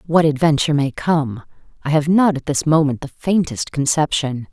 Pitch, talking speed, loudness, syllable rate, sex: 150 Hz, 175 wpm, -18 LUFS, 5.0 syllables/s, female